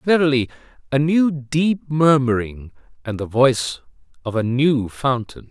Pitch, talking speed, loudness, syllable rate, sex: 135 Hz, 130 wpm, -19 LUFS, 4.3 syllables/s, male